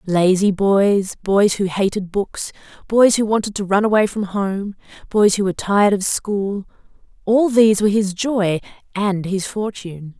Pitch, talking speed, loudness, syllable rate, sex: 200 Hz, 160 wpm, -18 LUFS, 4.6 syllables/s, female